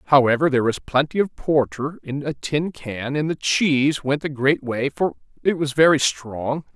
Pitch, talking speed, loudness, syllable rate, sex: 140 Hz, 195 wpm, -21 LUFS, 4.6 syllables/s, male